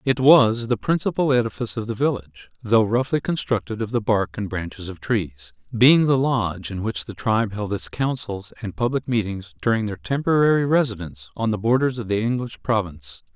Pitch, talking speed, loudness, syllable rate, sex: 110 Hz, 190 wpm, -22 LUFS, 5.5 syllables/s, male